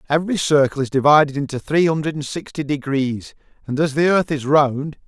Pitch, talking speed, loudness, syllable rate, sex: 145 Hz, 190 wpm, -19 LUFS, 5.5 syllables/s, male